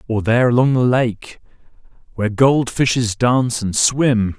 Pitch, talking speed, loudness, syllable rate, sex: 120 Hz, 150 wpm, -16 LUFS, 4.6 syllables/s, male